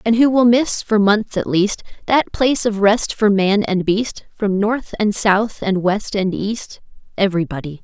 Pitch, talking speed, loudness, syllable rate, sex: 205 Hz, 190 wpm, -17 LUFS, 4.3 syllables/s, female